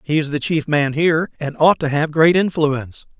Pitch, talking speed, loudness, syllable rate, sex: 150 Hz, 225 wpm, -17 LUFS, 5.2 syllables/s, male